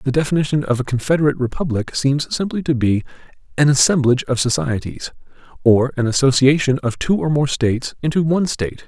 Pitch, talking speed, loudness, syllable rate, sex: 135 Hz, 170 wpm, -18 LUFS, 6.1 syllables/s, male